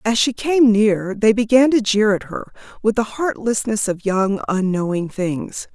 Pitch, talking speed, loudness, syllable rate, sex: 215 Hz, 180 wpm, -18 LUFS, 4.2 syllables/s, female